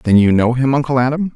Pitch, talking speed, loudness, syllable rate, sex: 130 Hz, 265 wpm, -14 LUFS, 6.1 syllables/s, male